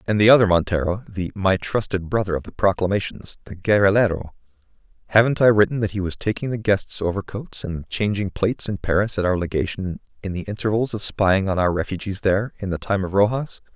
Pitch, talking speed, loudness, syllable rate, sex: 100 Hz, 190 wpm, -21 LUFS, 5.8 syllables/s, male